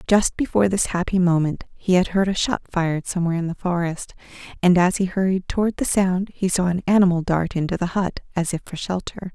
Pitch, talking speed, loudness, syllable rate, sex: 180 Hz, 220 wpm, -21 LUFS, 5.9 syllables/s, female